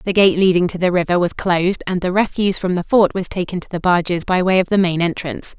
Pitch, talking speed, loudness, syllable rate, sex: 180 Hz, 270 wpm, -17 LUFS, 6.3 syllables/s, female